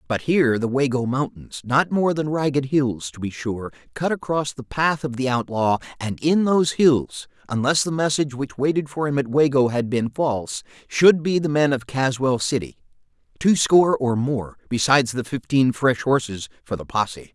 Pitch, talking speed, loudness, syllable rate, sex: 135 Hz, 185 wpm, -21 LUFS, 4.9 syllables/s, male